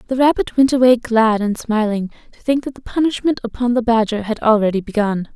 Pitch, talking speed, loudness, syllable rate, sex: 230 Hz, 200 wpm, -17 LUFS, 5.7 syllables/s, female